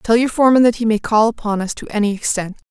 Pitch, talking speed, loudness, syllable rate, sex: 220 Hz, 265 wpm, -16 LUFS, 6.6 syllables/s, female